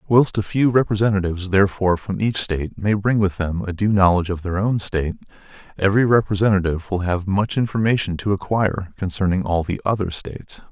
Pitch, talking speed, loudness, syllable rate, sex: 100 Hz, 180 wpm, -20 LUFS, 6.2 syllables/s, male